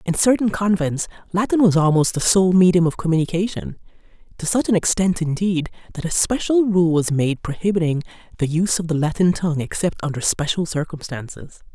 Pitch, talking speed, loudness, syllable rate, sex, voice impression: 170 Hz, 165 wpm, -19 LUFS, 5.7 syllables/s, female, feminine, middle-aged, powerful, clear, fluent, intellectual, elegant, lively, strict, sharp